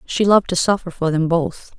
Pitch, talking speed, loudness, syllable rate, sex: 175 Hz, 235 wpm, -18 LUFS, 5.4 syllables/s, female